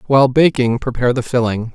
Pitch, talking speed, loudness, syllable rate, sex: 125 Hz, 170 wpm, -15 LUFS, 6.3 syllables/s, male